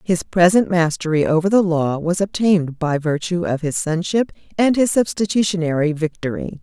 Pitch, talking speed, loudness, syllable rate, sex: 175 Hz, 155 wpm, -18 LUFS, 5.1 syllables/s, female